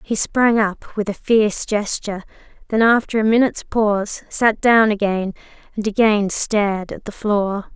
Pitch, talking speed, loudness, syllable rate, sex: 210 Hz, 160 wpm, -18 LUFS, 4.6 syllables/s, female